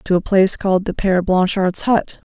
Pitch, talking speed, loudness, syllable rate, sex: 190 Hz, 205 wpm, -17 LUFS, 5.6 syllables/s, female